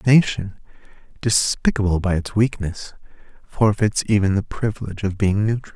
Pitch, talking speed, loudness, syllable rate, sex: 105 Hz, 135 wpm, -20 LUFS, 5.4 syllables/s, male